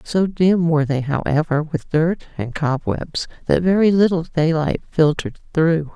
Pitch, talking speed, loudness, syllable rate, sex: 160 Hz, 150 wpm, -19 LUFS, 4.6 syllables/s, female